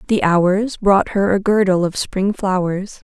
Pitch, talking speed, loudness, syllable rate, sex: 195 Hz, 175 wpm, -17 LUFS, 3.9 syllables/s, female